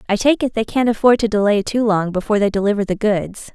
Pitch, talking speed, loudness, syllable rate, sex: 210 Hz, 255 wpm, -17 LUFS, 6.3 syllables/s, female